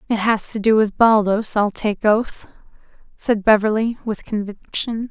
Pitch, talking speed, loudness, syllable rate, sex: 215 Hz, 155 wpm, -18 LUFS, 4.3 syllables/s, female